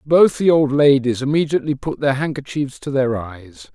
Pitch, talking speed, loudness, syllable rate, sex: 135 Hz, 175 wpm, -18 LUFS, 5.0 syllables/s, male